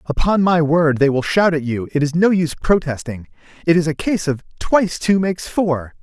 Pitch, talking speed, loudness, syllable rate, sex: 160 Hz, 220 wpm, -17 LUFS, 5.4 syllables/s, male